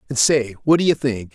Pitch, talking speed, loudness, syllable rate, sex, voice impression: 130 Hz, 270 wpm, -18 LUFS, 5.6 syllables/s, male, very masculine, very adult-like, slightly old, thick, tensed, powerful, very bright, slightly hard, clear, very fluent, slightly raspy, cool, intellectual, slightly refreshing, sincere, slightly calm, friendly, reassuring, unique, very wild, very lively, strict, slightly intense